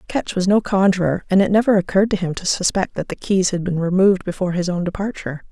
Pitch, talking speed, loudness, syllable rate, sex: 185 Hz, 240 wpm, -19 LUFS, 6.6 syllables/s, female